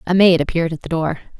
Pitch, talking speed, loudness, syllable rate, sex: 165 Hz, 260 wpm, -17 LUFS, 7.3 syllables/s, female